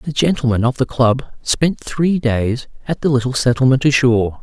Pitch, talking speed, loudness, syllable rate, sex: 130 Hz, 175 wpm, -16 LUFS, 5.0 syllables/s, male